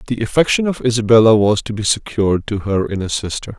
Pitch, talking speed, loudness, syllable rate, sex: 110 Hz, 220 wpm, -16 LUFS, 6.2 syllables/s, male